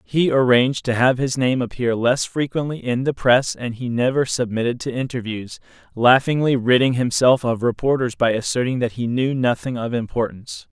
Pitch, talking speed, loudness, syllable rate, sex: 125 Hz, 170 wpm, -19 LUFS, 5.2 syllables/s, male